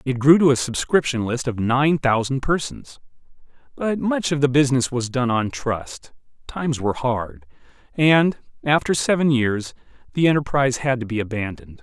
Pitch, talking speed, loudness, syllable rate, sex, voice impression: 130 Hz, 160 wpm, -20 LUFS, 5.0 syllables/s, male, masculine, adult-like, clear, slightly fluent, slightly intellectual, refreshing, sincere